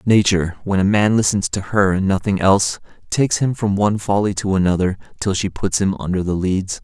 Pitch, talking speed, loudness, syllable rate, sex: 100 Hz, 210 wpm, -18 LUFS, 5.7 syllables/s, male